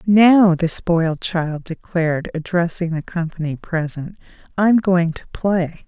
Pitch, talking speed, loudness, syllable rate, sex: 175 Hz, 135 wpm, -18 LUFS, 4.0 syllables/s, female